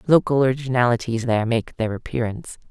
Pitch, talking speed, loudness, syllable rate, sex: 120 Hz, 135 wpm, -21 LUFS, 6.5 syllables/s, female